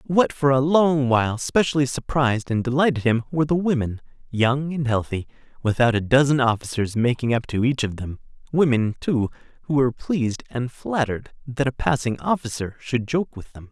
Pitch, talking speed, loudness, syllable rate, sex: 130 Hz, 180 wpm, -22 LUFS, 5.4 syllables/s, male